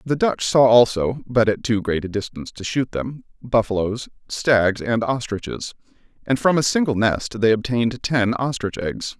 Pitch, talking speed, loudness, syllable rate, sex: 115 Hz, 175 wpm, -20 LUFS, 4.7 syllables/s, male